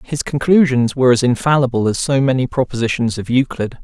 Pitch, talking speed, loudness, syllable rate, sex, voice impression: 130 Hz, 170 wpm, -16 LUFS, 6.0 syllables/s, male, very masculine, very adult-like, very thick, tensed, slightly powerful, bright, soft, slightly muffled, fluent, slightly raspy, cool, very intellectual, refreshing, sincere, very calm, mature, friendly, very reassuring, unique, elegant, wild, very sweet, lively, kind, slightly modest